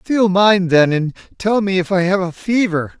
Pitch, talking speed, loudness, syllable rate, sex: 190 Hz, 220 wpm, -16 LUFS, 4.5 syllables/s, male